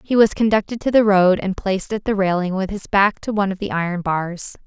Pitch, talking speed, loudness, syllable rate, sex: 195 Hz, 255 wpm, -19 LUFS, 5.8 syllables/s, female